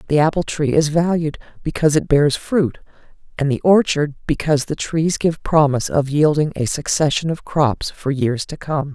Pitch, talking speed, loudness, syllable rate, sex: 150 Hz, 180 wpm, -18 LUFS, 5.0 syllables/s, female